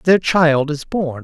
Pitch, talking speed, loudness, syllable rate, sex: 155 Hz, 195 wpm, -16 LUFS, 3.2 syllables/s, male